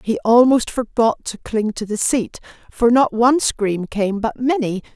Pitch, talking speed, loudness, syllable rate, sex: 230 Hz, 180 wpm, -18 LUFS, 4.3 syllables/s, female